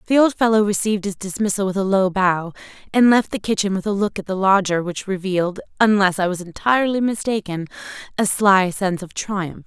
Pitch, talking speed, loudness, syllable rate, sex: 195 Hz, 200 wpm, -19 LUFS, 4.8 syllables/s, female